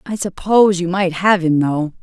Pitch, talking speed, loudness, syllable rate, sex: 180 Hz, 205 wpm, -16 LUFS, 4.9 syllables/s, female